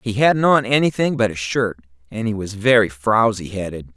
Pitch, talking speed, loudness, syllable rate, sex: 110 Hz, 195 wpm, -18 LUFS, 5.0 syllables/s, male